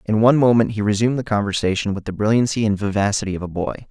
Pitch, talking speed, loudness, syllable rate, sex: 105 Hz, 230 wpm, -19 LUFS, 7.1 syllables/s, male